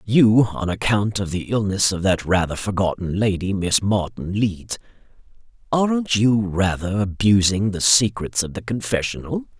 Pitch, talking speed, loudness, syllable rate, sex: 100 Hz, 140 wpm, -20 LUFS, 4.6 syllables/s, male